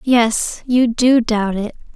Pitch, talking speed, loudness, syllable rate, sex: 230 Hz, 155 wpm, -16 LUFS, 3.1 syllables/s, female